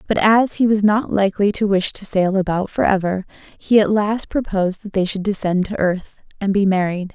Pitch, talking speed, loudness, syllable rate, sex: 200 Hz, 220 wpm, -18 LUFS, 5.2 syllables/s, female